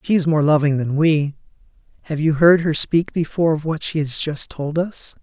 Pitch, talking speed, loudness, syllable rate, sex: 155 Hz, 220 wpm, -18 LUFS, 5.1 syllables/s, male